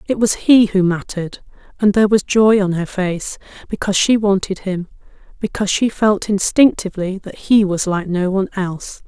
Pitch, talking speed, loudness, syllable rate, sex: 195 Hz, 180 wpm, -16 LUFS, 5.3 syllables/s, female